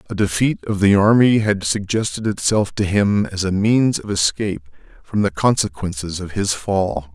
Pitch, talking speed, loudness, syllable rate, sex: 100 Hz, 175 wpm, -18 LUFS, 4.8 syllables/s, male